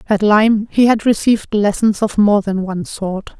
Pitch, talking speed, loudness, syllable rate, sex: 210 Hz, 195 wpm, -15 LUFS, 5.0 syllables/s, female